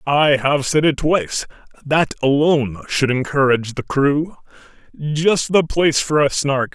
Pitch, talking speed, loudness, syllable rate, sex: 145 Hz, 150 wpm, -17 LUFS, 4.4 syllables/s, male